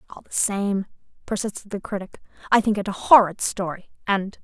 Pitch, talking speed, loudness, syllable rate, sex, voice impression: 200 Hz, 175 wpm, -22 LUFS, 5.4 syllables/s, female, feminine, slightly young, slightly fluent, slightly cute, refreshing, slightly intense